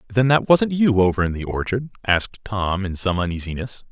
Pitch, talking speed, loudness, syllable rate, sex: 105 Hz, 200 wpm, -20 LUFS, 5.4 syllables/s, male